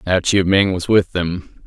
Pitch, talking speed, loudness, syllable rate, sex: 95 Hz, 215 wpm, -17 LUFS, 4.0 syllables/s, male